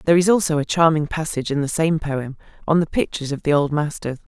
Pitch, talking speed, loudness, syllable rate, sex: 155 Hz, 235 wpm, -20 LUFS, 6.6 syllables/s, female